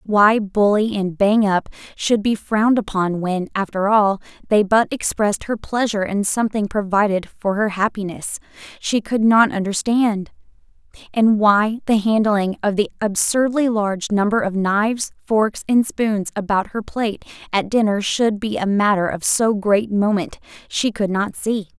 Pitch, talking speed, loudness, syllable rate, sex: 210 Hz, 160 wpm, -19 LUFS, 4.5 syllables/s, female